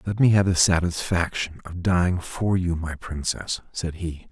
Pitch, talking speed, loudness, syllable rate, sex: 85 Hz, 180 wpm, -24 LUFS, 4.5 syllables/s, male